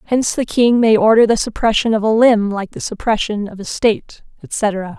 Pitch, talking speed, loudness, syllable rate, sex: 220 Hz, 205 wpm, -15 LUFS, 5.2 syllables/s, female